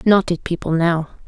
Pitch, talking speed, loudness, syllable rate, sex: 175 Hz, 190 wpm, -19 LUFS, 5.0 syllables/s, female